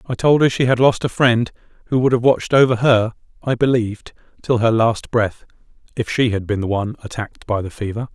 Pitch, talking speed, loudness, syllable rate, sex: 115 Hz, 220 wpm, -18 LUFS, 5.9 syllables/s, male